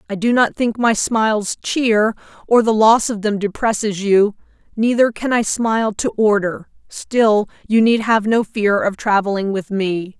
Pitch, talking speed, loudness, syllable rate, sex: 215 Hz, 175 wpm, -17 LUFS, 4.3 syllables/s, female